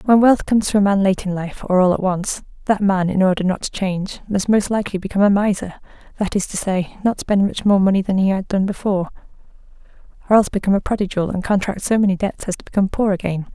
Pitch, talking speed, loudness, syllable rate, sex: 195 Hz, 240 wpm, -18 LUFS, 6.7 syllables/s, female